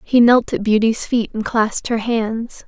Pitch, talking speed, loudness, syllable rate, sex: 225 Hz, 200 wpm, -17 LUFS, 4.3 syllables/s, female